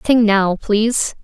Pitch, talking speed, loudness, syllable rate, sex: 215 Hz, 145 wpm, -16 LUFS, 3.8 syllables/s, female